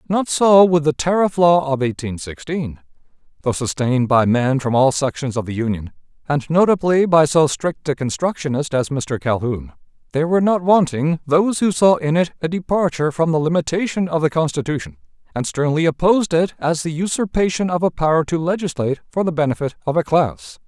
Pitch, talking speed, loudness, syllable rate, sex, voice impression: 150 Hz, 185 wpm, -18 LUFS, 5.6 syllables/s, male, masculine, middle-aged, tensed, powerful, clear, fluent, cool, calm, friendly, wild, lively, strict